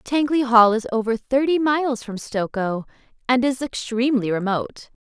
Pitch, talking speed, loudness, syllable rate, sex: 240 Hz, 145 wpm, -21 LUFS, 5.0 syllables/s, female